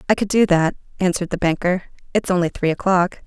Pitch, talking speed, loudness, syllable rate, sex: 180 Hz, 200 wpm, -19 LUFS, 6.3 syllables/s, female